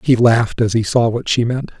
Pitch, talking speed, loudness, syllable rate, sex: 120 Hz, 265 wpm, -16 LUFS, 5.5 syllables/s, male